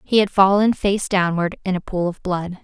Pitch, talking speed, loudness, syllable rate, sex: 190 Hz, 230 wpm, -19 LUFS, 4.9 syllables/s, female